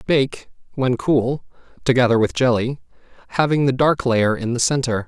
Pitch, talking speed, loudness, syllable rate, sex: 125 Hz, 155 wpm, -19 LUFS, 4.8 syllables/s, male